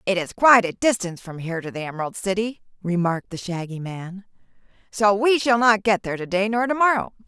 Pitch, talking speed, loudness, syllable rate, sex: 200 Hz, 215 wpm, -21 LUFS, 6.2 syllables/s, female